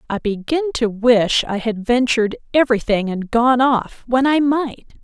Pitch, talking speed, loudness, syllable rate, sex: 240 Hz, 180 wpm, -17 LUFS, 4.6 syllables/s, female